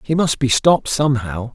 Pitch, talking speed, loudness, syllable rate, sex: 130 Hz, 195 wpm, -17 LUFS, 5.5 syllables/s, male